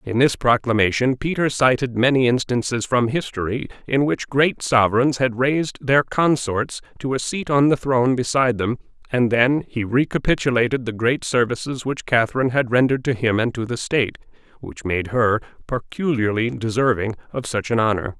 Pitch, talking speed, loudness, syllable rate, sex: 125 Hz, 170 wpm, -20 LUFS, 5.3 syllables/s, male